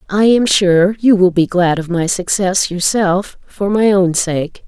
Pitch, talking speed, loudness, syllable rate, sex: 190 Hz, 195 wpm, -14 LUFS, 3.9 syllables/s, female